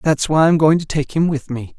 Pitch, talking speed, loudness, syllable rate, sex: 150 Hz, 305 wpm, -16 LUFS, 5.2 syllables/s, male